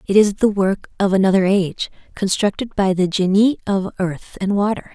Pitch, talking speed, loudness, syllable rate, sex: 195 Hz, 180 wpm, -18 LUFS, 5.1 syllables/s, female